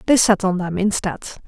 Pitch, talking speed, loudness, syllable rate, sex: 195 Hz, 205 wpm, -19 LUFS, 5.4 syllables/s, female